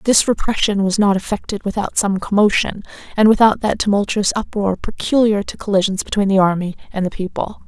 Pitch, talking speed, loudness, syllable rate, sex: 205 Hz, 170 wpm, -17 LUFS, 5.7 syllables/s, female